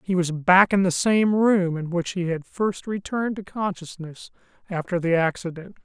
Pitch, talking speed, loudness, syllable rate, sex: 180 Hz, 185 wpm, -22 LUFS, 4.7 syllables/s, male